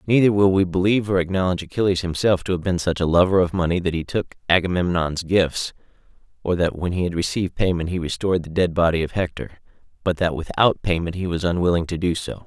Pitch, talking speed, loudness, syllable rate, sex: 90 Hz, 215 wpm, -21 LUFS, 6.3 syllables/s, male